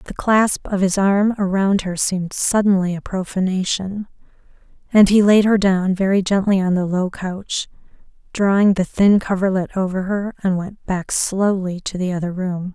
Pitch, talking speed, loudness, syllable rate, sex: 190 Hz, 170 wpm, -18 LUFS, 4.6 syllables/s, female